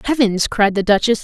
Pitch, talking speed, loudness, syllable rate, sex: 215 Hz, 195 wpm, -16 LUFS, 5.4 syllables/s, female